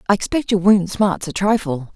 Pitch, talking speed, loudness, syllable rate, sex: 195 Hz, 215 wpm, -18 LUFS, 5.2 syllables/s, female